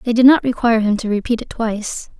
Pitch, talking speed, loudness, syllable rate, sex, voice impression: 225 Hz, 245 wpm, -17 LUFS, 6.5 syllables/s, female, feminine, young, clear, cute, friendly, slightly kind